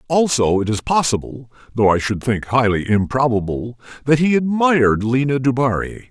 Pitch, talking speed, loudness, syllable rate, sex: 125 Hz, 145 wpm, -17 LUFS, 5.1 syllables/s, male